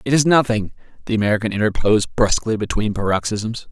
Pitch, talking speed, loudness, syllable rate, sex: 110 Hz, 145 wpm, -19 LUFS, 6.4 syllables/s, male